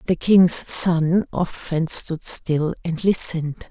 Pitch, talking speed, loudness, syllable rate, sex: 170 Hz, 130 wpm, -19 LUFS, 3.3 syllables/s, female